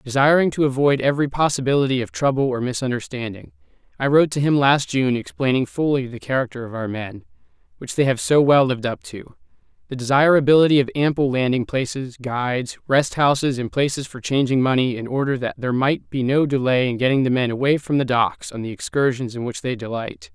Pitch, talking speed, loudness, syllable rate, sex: 130 Hz, 200 wpm, -20 LUFS, 5.9 syllables/s, male